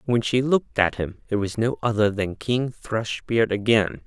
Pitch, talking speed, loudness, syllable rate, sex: 110 Hz, 190 wpm, -23 LUFS, 4.5 syllables/s, male